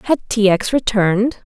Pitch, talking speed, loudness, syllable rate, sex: 220 Hz, 160 wpm, -16 LUFS, 4.8 syllables/s, female